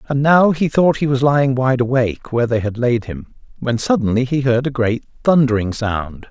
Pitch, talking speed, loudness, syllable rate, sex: 125 Hz, 210 wpm, -17 LUFS, 5.2 syllables/s, male